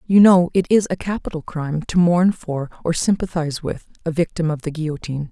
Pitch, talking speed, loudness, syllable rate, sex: 165 Hz, 205 wpm, -20 LUFS, 5.9 syllables/s, female